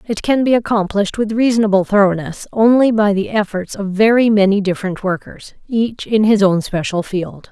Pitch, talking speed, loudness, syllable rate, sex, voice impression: 205 Hz, 175 wpm, -15 LUFS, 5.3 syllables/s, female, feminine, slightly young, clear, fluent, slightly intellectual, refreshing, slightly lively